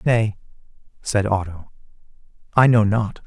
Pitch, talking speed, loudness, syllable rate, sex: 105 Hz, 110 wpm, -19 LUFS, 4.3 syllables/s, male